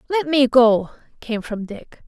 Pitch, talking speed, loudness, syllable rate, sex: 245 Hz, 175 wpm, -18 LUFS, 4.0 syllables/s, female